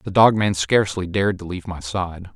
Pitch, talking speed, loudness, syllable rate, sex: 95 Hz, 230 wpm, -20 LUFS, 5.7 syllables/s, male